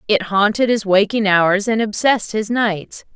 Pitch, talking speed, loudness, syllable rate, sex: 210 Hz, 170 wpm, -16 LUFS, 4.5 syllables/s, female